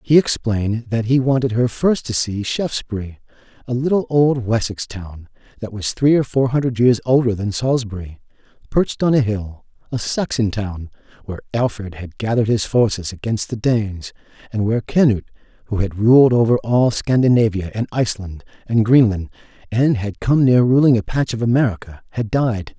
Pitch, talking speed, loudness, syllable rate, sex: 115 Hz, 170 wpm, -18 LUFS, 5.3 syllables/s, male